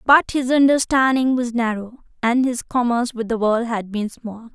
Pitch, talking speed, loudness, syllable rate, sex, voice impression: 240 Hz, 185 wpm, -19 LUFS, 4.8 syllables/s, female, feminine, slightly gender-neutral, slightly young, tensed, powerful, soft, clear, slightly halting, intellectual, slightly friendly, unique, lively, slightly intense